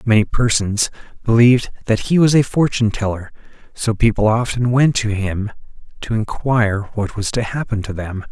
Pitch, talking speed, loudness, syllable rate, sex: 110 Hz, 165 wpm, -17 LUFS, 5.1 syllables/s, male